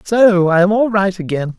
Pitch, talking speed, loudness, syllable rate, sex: 195 Hz, 225 wpm, -14 LUFS, 4.7 syllables/s, male